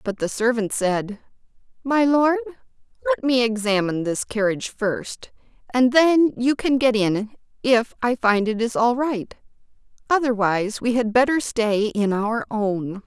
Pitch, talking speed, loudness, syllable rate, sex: 235 Hz, 150 wpm, -21 LUFS, 4.3 syllables/s, female